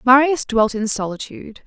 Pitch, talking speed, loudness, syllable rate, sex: 235 Hz, 145 wpm, -18 LUFS, 5.2 syllables/s, female